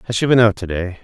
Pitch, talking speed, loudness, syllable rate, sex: 105 Hz, 350 wpm, -16 LUFS, 7.3 syllables/s, male